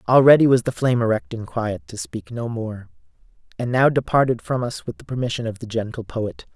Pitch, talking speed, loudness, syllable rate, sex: 120 Hz, 210 wpm, -21 LUFS, 5.7 syllables/s, male